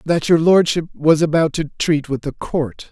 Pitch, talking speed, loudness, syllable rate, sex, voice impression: 155 Hz, 205 wpm, -17 LUFS, 4.4 syllables/s, male, masculine, adult-like, slightly refreshing, friendly, kind